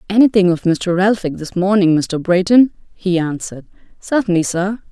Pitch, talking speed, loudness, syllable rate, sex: 190 Hz, 145 wpm, -16 LUFS, 5.1 syllables/s, female